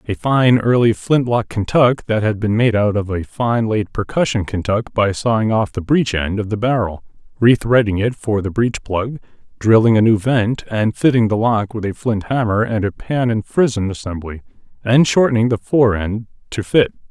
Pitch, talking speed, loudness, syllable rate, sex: 110 Hz, 195 wpm, -17 LUFS, 4.8 syllables/s, male